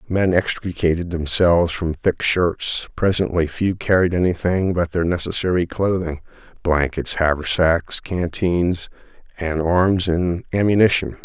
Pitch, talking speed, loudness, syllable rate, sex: 85 Hz, 110 wpm, -19 LUFS, 4.2 syllables/s, male